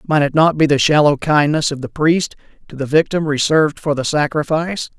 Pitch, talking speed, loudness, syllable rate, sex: 150 Hz, 205 wpm, -16 LUFS, 5.5 syllables/s, male